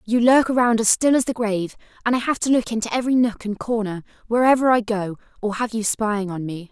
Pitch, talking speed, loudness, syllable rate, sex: 225 Hz, 240 wpm, -20 LUFS, 6.0 syllables/s, female